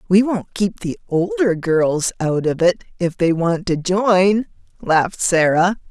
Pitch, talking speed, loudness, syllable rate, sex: 180 Hz, 165 wpm, -18 LUFS, 3.8 syllables/s, female